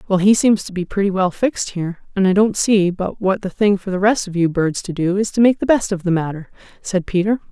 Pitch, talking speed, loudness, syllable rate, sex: 195 Hz, 280 wpm, -18 LUFS, 5.8 syllables/s, female